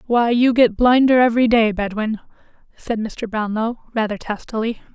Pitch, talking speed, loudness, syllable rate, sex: 225 Hz, 145 wpm, -18 LUFS, 5.0 syllables/s, female